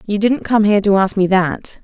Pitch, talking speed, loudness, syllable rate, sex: 200 Hz, 260 wpm, -15 LUFS, 5.3 syllables/s, female